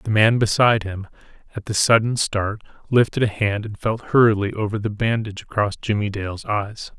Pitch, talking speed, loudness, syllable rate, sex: 105 Hz, 180 wpm, -20 LUFS, 5.4 syllables/s, male